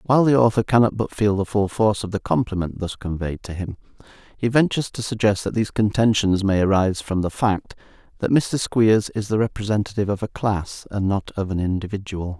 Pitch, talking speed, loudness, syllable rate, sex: 105 Hz, 205 wpm, -21 LUFS, 5.9 syllables/s, male